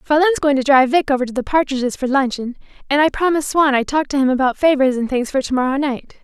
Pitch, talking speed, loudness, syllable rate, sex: 275 Hz, 250 wpm, -17 LUFS, 6.7 syllables/s, female